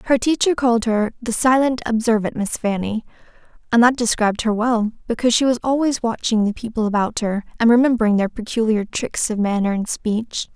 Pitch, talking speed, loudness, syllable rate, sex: 230 Hz, 180 wpm, -19 LUFS, 5.7 syllables/s, female